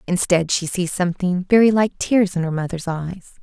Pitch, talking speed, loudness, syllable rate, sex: 180 Hz, 195 wpm, -19 LUFS, 5.3 syllables/s, female